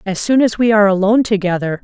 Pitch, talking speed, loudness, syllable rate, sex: 205 Hz, 230 wpm, -14 LUFS, 7.0 syllables/s, female